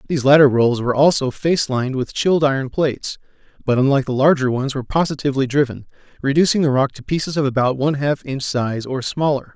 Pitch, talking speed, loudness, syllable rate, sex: 135 Hz, 200 wpm, -18 LUFS, 6.5 syllables/s, male